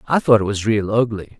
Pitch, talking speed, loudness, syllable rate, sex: 110 Hz, 260 wpm, -18 LUFS, 5.8 syllables/s, male